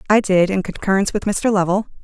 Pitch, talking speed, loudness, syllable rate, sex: 195 Hz, 205 wpm, -18 LUFS, 6.5 syllables/s, female